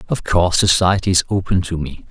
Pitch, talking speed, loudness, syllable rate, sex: 90 Hz, 200 wpm, -17 LUFS, 6.0 syllables/s, male